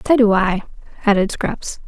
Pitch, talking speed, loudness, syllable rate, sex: 210 Hz, 160 wpm, -18 LUFS, 4.7 syllables/s, female